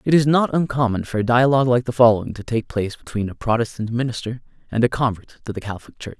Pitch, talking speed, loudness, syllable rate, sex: 120 Hz, 230 wpm, -20 LUFS, 6.8 syllables/s, male